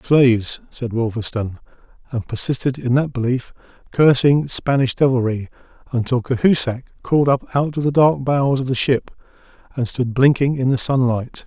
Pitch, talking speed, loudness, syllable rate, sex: 130 Hz, 150 wpm, -18 LUFS, 5.2 syllables/s, male